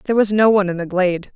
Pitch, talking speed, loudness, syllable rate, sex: 195 Hz, 310 wpm, -17 LUFS, 8.4 syllables/s, female